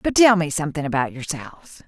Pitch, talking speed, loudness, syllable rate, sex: 160 Hz, 190 wpm, -20 LUFS, 6.0 syllables/s, female